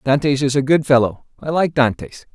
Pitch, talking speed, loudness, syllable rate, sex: 140 Hz, 205 wpm, -17 LUFS, 5.3 syllables/s, male